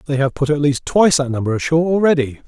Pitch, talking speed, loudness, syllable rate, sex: 145 Hz, 240 wpm, -16 LUFS, 7.1 syllables/s, male